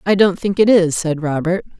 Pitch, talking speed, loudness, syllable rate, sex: 180 Hz, 235 wpm, -16 LUFS, 5.3 syllables/s, female